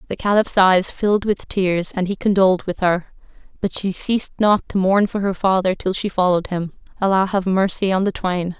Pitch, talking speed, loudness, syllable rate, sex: 190 Hz, 205 wpm, -19 LUFS, 5.3 syllables/s, female